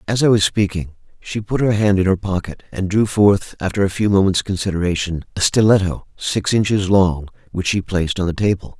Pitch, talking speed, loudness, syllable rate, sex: 100 Hz, 205 wpm, -18 LUFS, 5.5 syllables/s, male